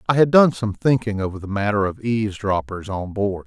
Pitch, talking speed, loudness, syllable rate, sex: 105 Hz, 210 wpm, -20 LUFS, 5.5 syllables/s, male